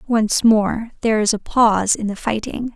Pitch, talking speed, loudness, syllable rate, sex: 220 Hz, 195 wpm, -18 LUFS, 4.9 syllables/s, female